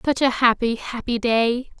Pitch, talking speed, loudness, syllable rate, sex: 240 Hz, 165 wpm, -20 LUFS, 4.3 syllables/s, female